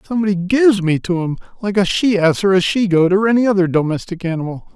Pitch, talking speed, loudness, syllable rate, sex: 190 Hz, 215 wpm, -16 LUFS, 6.2 syllables/s, male